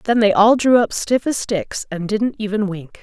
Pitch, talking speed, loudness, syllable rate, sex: 210 Hz, 240 wpm, -18 LUFS, 4.6 syllables/s, female